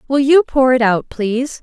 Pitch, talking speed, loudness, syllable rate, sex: 255 Hz, 220 wpm, -14 LUFS, 4.8 syllables/s, female